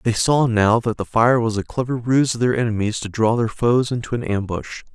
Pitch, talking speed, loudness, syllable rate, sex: 115 Hz, 245 wpm, -19 LUFS, 5.2 syllables/s, male